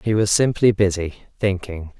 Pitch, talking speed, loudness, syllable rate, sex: 100 Hz, 120 wpm, -19 LUFS, 4.9 syllables/s, male